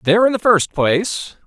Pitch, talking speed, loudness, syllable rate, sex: 190 Hz, 205 wpm, -16 LUFS, 5.5 syllables/s, male